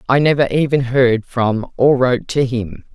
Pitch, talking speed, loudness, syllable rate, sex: 125 Hz, 185 wpm, -16 LUFS, 4.5 syllables/s, female